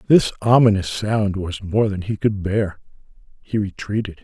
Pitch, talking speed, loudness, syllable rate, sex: 100 Hz, 155 wpm, -20 LUFS, 4.5 syllables/s, male